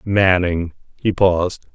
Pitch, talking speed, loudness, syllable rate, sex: 90 Hz, 105 wpm, -18 LUFS, 3.9 syllables/s, male